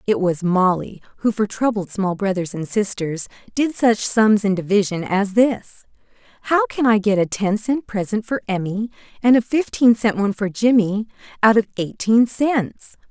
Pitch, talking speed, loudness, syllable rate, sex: 210 Hz, 175 wpm, -19 LUFS, 4.6 syllables/s, female